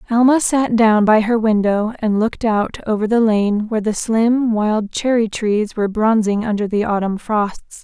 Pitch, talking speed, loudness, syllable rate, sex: 220 Hz, 185 wpm, -17 LUFS, 4.6 syllables/s, female